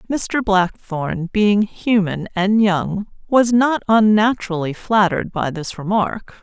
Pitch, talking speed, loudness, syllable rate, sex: 200 Hz, 120 wpm, -18 LUFS, 3.9 syllables/s, female